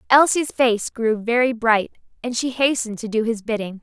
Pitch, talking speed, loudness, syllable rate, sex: 230 Hz, 190 wpm, -20 LUFS, 5.0 syllables/s, female